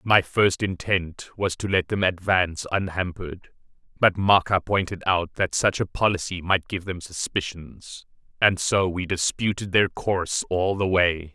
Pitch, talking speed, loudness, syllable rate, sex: 90 Hz, 160 wpm, -23 LUFS, 4.5 syllables/s, male